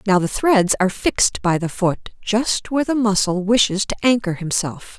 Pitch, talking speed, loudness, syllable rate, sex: 205 Hz, 190 wpm, -19 LUFS, 5.0 syllables/s, female